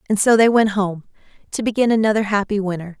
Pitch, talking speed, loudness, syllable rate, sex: 205 Hz, 200 wpm, -18 LUFS, 6.4 syllables/s, female